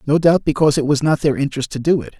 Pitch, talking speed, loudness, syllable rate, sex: 145 Hz, 300 wpm, -17 LUFS, 7.4 syllables/s, male